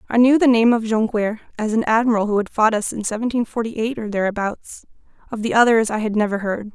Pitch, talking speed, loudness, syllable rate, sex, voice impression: 220 Hz, 230 wpm, -19 LUFS, 6.3 syllables/s, female, feminine, adult-like, slightly clear, slightly refreshing, friendly, slightly kind